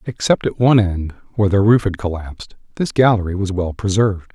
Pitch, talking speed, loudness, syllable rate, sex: 100 Hz, 195 wpm, -17 LUFS, 5.9 syllables/s, male